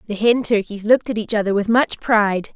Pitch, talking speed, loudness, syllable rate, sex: 215 Hz, 235 wpm, -18 LUFS, 5.9 syllables/s, female